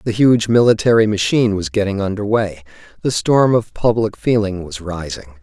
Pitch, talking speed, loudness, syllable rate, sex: 105 Hz, 165 wpm, -16 LUFS, 5.1 syllables/s, male